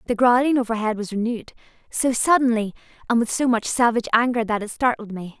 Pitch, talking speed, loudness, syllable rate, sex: 230 Hz, 190 wpm, -21 LUFS, 6.3 syllables/s, female